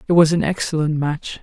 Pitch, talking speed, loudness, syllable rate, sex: 160 Hz, 210 wpm, -19 LUFS, 5.6 syllables/s, male